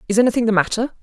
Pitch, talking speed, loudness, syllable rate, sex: 220 Hz, 235 wpm, -18 LUFS, 9.0 syllables/s, female